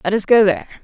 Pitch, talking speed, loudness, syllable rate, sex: 210 Hz, 290 wpm, -15 LUFS, 8.2 syllables/s, female